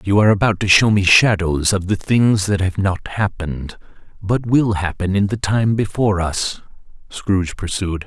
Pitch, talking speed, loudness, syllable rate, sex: 100 Hz, 180 wpm, -17 LUFS, 4.8 syllables/s, male